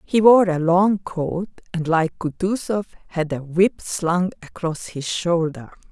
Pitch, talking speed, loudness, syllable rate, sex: 175 Hz, 150 wpm, -21 LUFS, 3.8 syllables/s, female